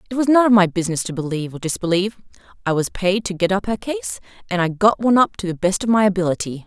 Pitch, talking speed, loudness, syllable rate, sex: 195 Hz, 260 wpm, -19 LUFS, 7.0 syllables/s, female